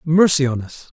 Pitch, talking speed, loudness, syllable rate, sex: 145 Hz, 180 wpm, -17 LUFS, 4.8 syllables/s, male